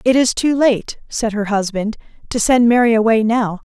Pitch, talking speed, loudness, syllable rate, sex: 225 Hz, 195 wpm, -16 LUFS, 4.7 syllables/s, female